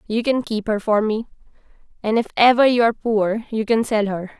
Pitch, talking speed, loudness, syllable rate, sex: 220 Hz, 205 wpm, -19 LUFS, 5.3 syllables/s, female